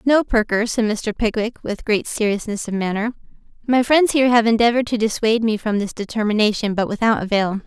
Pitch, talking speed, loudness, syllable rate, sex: 220 Hz, 190 wpm, -19 LUFS, 5.9 syllables/s, female